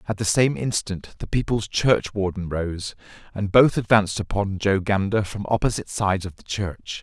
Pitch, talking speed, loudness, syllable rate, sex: 100 Hz, 170 wpm, -23 LUFS, 5.0 syllables/s, male